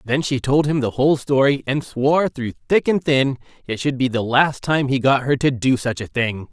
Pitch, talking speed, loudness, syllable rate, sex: 135 Hz, 250 wpm, -19 LUFS, 5.0 syllables/s, male